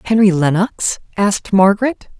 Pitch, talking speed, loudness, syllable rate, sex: 200 Hz, 110 wpm, -15 LUFS, 4.9 syllables/s, female